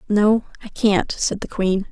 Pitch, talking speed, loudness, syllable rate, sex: 205 Hz, 190 wpm, -20 LUFS, 4.0 syllables/s, female